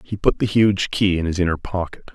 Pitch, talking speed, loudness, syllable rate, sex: 95 Hz, 250 wpm, -20 LUFS, 5.4 syllables/s, male